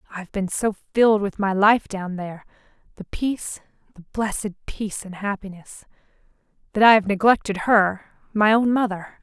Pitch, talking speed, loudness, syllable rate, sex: 205 Hz, 135 wpm, -21 LUFS, 5.1 syllables/s, female